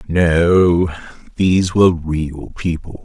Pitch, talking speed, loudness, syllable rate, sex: 85 Hz, 100 wpm, -16 LUFS, 3.5 syllables/s, male